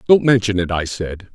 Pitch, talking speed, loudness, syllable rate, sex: 105 Hz, 225 wpm, -18 LUFS, 5.3 syllables/s, male